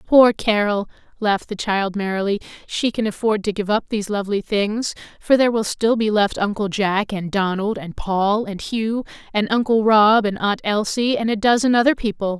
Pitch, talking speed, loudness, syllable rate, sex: 210 Hz, 195 wpm, -19 LUFS, 5.1 syllables/s, female